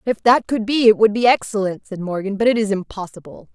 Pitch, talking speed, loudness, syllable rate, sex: 215 Hz, 235 wpm, -17 LUFS, 5.9 syllables/s, female